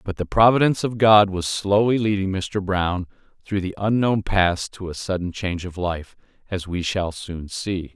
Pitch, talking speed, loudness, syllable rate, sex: 95 Hz, 190 wpm, -21 LUFS, 4.6 syllables/s, male